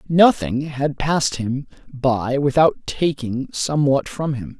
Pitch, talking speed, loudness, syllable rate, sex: 140 Hz, 130 wpm, -20 LUFS, 3.9 syllables/s, male